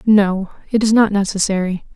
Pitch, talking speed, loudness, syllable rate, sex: 200 Hz, 155 wpm, -17 LUFS, 5.0 syllables/s, female